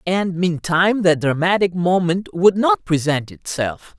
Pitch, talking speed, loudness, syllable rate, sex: 180 Hz, 135 wpm, -18 LUFS, 4.1 syllables/s, female